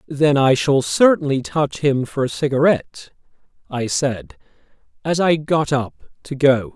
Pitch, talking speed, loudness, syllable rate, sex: 140 Hz, 150 wpm, -18 LUFS, 4.2 syllables/s, male